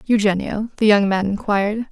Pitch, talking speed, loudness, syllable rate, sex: 210 Hz, 155 wpm, -18 LUFS, 5.3 syllables/s, female